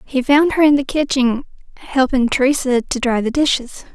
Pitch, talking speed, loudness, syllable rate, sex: 265 Hz, 185 wpm, -16 LUFS, 4.9 syllables/s, female